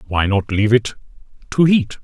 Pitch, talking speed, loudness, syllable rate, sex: 115 Hz, 175 wpm, -17 LUFS, 5.5 syllables/s, male